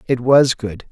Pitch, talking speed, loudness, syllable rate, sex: 120 Hz, 200 wpm, -15 LUFS, 3.9 syllables/s, male